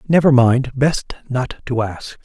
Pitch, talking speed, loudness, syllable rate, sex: 130 Hz, 160 wpm, -17 LUFS, 3.8 syllables/s, male